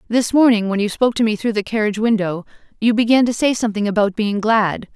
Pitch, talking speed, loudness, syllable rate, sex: 220 Hz, 230 wpm, -17 LUFS, 6.4 syllables/s, female